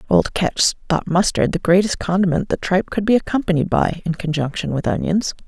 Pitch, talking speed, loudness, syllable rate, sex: 180 Hz, 185 wpm, -19 LUFS, 5.7 syllables/s, female